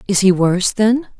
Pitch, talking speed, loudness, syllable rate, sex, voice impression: 200 Hz, 200 wpm, -15 LUFS, 5.2 syllables/s, female, feminine, middle-aged, tensed, hard, slightly muffled, slightly raspy, intellectual, calm, slightly lively, strict, sharp